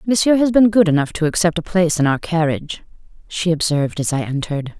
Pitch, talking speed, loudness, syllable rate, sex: 165 Hz, 215 wpm, -17 LUFS, 6.4 syllables/s, female